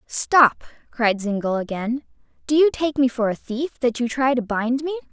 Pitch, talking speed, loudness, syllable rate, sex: 250 Hz, 200 wpm, -21 LUFS, 4.6 syllables/s, female